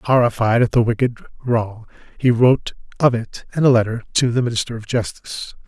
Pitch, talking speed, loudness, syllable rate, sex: 120 Hz, 180 wpm, -19 LUFS, 5.4 syllables/s, male